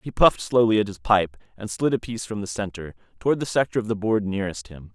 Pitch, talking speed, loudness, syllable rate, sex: 105 Hz, 255 wpm, -23 LUFS, 6.6 syllables/s, male